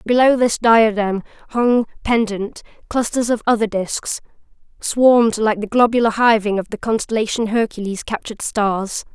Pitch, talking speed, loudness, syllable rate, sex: 220 Hz, 130 wpm, -18 LUFS, 4.8 syllables/s, female